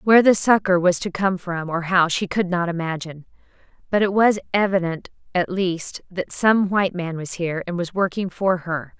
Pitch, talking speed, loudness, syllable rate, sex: 180 Hz, 200 wpm, -21 LUFS, 5.1 syllables/s, female